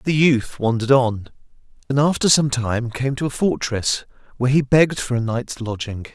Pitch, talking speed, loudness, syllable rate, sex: 125 Hz, 185 wpm, -20 LUFS, 5.0 syllables/s, male